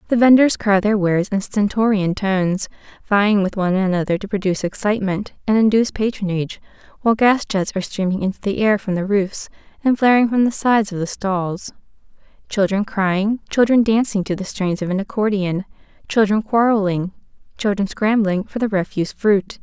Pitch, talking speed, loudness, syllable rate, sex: 205 Hz, 170 wpm, -18 LUFS, 5.6 syllables/s, female